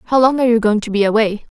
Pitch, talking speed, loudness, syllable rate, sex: 225 Hz, 310 wpm, -15 LUFS, 6.9 syllables/s, female